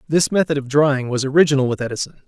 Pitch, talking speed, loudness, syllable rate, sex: 140 Hz, 210 wpm, -18 LUFS, 7.0 syllables/s, male